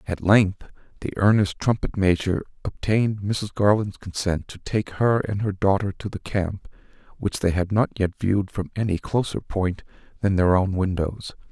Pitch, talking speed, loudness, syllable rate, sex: 100 Hz, 170 wpm, -23 LUFS, 4.7 syllables/s, male